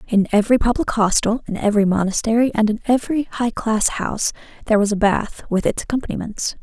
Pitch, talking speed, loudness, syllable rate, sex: 220 Hz, 180 wpm, -19 LUFS, 6.3 syllables/s, female